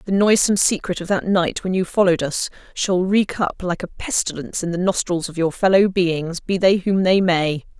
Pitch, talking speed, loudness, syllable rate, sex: 185 Hz, 215 wpm, -19 LUFS, 5.2 syllables/s, female